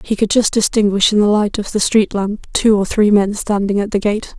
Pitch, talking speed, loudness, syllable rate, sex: 205 Hz, 260 wpm, -15 LUFS, 5.2 syllables/s, female